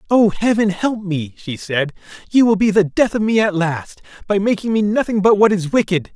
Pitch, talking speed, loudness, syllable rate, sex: 200 Hz, 225 wpm, -17 LUFS, 5.1 syllables/s, male